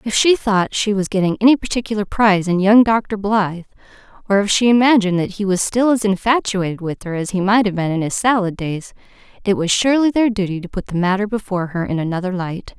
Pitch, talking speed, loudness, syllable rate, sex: 200 Hz, 225 wpm, -17 LUFS, 6.1 syllables/s, female